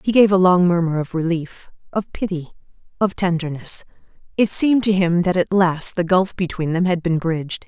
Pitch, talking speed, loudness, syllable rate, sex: 175 Hz, 195 wpm, -19 LUFS, 5.3 syllables/s, female